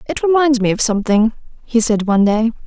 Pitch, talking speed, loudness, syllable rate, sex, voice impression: 235 Hz, 200 wpm, -15 LUFS, 6.1 syllables/s, female, very feminine, young, very thin, tensed, slightly weak, bright, slightly soft, very clear, slightly fluent, very cute, intellectual, very refreshing, sincere, very calm, very friendly, very reassuring, unique, elegant, slightly wild, very sweet, lively, kind, slightly sharp, light